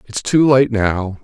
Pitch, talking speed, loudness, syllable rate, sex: 115 Hz, 195 wpm, -15 LUFS, 3.7 syllables/s, male